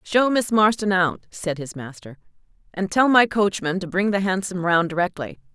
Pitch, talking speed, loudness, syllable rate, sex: 190 Hz, 185 wpm, -21 LUFS, 4.9 syllables/s, female